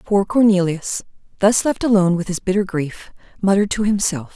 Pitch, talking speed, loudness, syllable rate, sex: 195 Hz, 165 wpm, -18 LUFS, 5.6 syllables/s, female